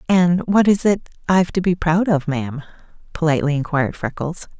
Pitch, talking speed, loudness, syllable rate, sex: 165 Hz, 170 wpm, -19 LUFS, 5.7 syllables/s, female